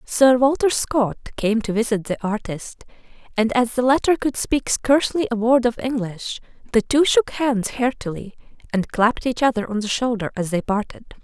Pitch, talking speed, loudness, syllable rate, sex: 235 Hz, 180 wpm, -20 LUFS, 4.9 syllables/s, female